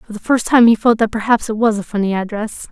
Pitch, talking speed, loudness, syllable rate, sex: 220 Hz, 285 wpm, -15 LUFS, 6.2 syllables/s, female